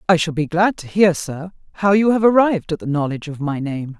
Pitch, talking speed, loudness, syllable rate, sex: 170 Hz, 255 wpm, -18 LUFS, 5.9 syllables/s, female